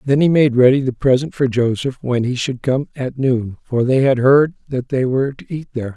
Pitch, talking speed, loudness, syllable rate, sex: 130 Hz, 240 wpm, -17 LUFS, 5.3 syllables/s, male